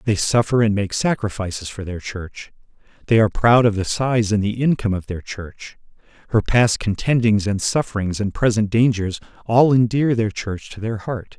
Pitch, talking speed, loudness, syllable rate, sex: 110 Hz, 185 wpm, -19 LUFS, 5.0 syllables/s, male